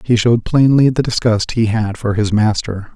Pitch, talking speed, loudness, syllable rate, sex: 115 Hz, 205 wpm, -15 LUFS, 4.9 syllables/s, male